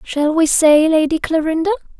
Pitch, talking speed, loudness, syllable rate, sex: 320 Hz, 150 wpm, -15 LUFS, 4.9 syllables/s, female